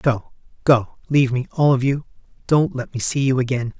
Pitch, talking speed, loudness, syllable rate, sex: 130 Hz, 205 wpm, -20 LUFS, 5.2 syllables/s, male